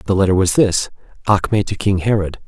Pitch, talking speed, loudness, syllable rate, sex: 95 Hz, 195 wpm, -17 LUFS, 5.8 syllables/s, male